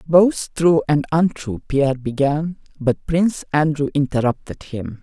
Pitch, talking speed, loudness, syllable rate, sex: 150 Hz, 130 wpm, -19 LUFS, 4.3 syllables/s, female